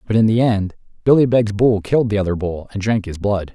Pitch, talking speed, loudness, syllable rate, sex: 105 Hz, 255 wpm, -17 LUFS, 5.8 syllables/s, male